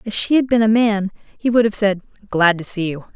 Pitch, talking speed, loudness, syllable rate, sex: 210 Hz, 265 wpm, -17 LUFS, 5.5 syllables/s, female